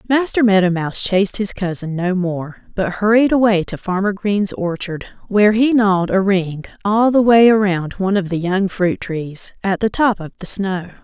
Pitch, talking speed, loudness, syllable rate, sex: 195 Hz, 195 wpm, -17 LUFS, 4.9 syllables/s, female